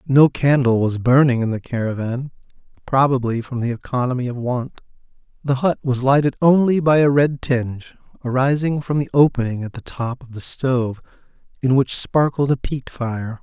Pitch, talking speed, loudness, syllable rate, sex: 130 Hz, 170 wpm, -19 LUFS, 5.0 syllables/s, male